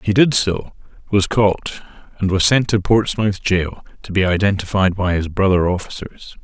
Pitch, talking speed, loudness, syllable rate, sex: 95 Hz, 170 wpm, -17 LUFS, 4.4 syllables/s, male